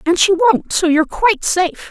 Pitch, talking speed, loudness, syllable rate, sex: 360 Hz, 220 wpm, -14 LUFS, 5.6 syllables/s, female